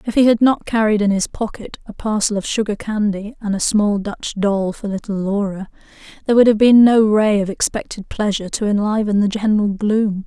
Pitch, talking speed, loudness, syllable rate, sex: 210 Hz, 205 wpm, -17 LUFS, 5.4 syllables/s, female